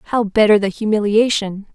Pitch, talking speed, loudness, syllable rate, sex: 210 Hz, 135 wpm, -16 LUFS, 4.9 syllables/s, female